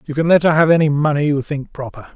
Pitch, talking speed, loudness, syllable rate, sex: 150 Hz, 280 wpm, -15 LUFS, 6.5 syllables/s, male